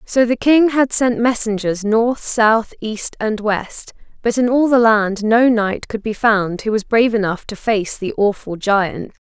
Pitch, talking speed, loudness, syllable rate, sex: 225 Hz, 195 wpm, -16 LUFS, 4.1 syllables/s, female